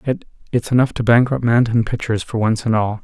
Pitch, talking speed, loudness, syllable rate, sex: 115 Hz, 200 wpm, -18 LUFS, 6.1 syllables/s, male